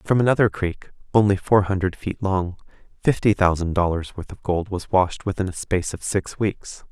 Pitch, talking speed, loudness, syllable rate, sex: 95 Hz, 190 wpm, -22 LUFS, 5.0 syllables/s, male